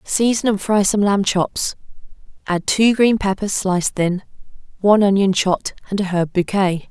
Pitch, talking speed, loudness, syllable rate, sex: 195 Hz, 165 wpm, -18 LUFS, 4.8 syllables/s, female